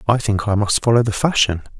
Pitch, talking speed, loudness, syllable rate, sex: 110 Hz, 235 wpm, -17 LUFS, 6.0 syllables/s, male